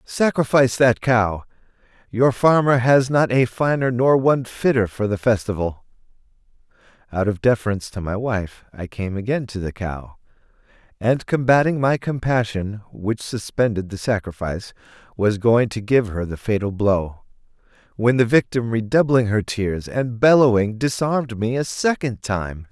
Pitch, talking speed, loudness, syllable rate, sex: 115 Hz, 150 wpm, -20 LUFS, 4.7 syllables/s, male